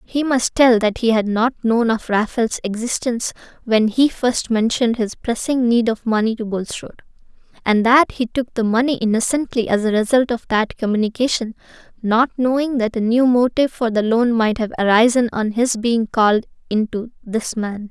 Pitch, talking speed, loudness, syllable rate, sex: 230 Hz, 185 wpm, -18 LUFS, 5.0 syllables/s, female